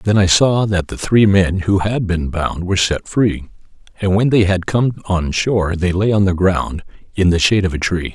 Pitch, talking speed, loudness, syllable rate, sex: 95 Hz, 235 wpm, -16 LUFS, 4.9 syllables/s, male